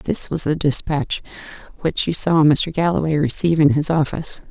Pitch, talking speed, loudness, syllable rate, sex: 155 Hz, 175 wpm, -18 LUFS, 5.2 syllables/s, female